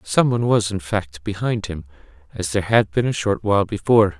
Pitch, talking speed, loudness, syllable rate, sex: 105 Hz, 215 wpm, -20 LUFS, 5.9 syllables/s, male